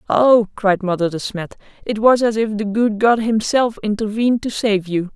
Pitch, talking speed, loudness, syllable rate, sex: 215 Hz, 200 wpm, -17 LUFS, 4.9 syllables/s, female